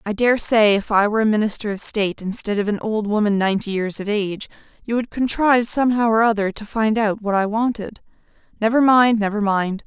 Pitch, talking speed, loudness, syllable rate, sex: 215 Hz, 215 wpm, -19 LUFS, 5.9 syllables/s, female